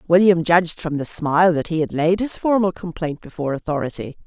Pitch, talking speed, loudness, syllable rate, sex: 170 Hz, 195 wpm, -19 LUFS, 5.9 syllables/s, female